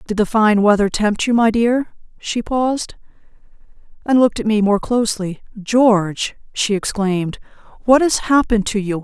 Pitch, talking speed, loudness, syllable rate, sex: 220 Hz, 160 wpm, -17 LUFS, 5.0 syllables/s, female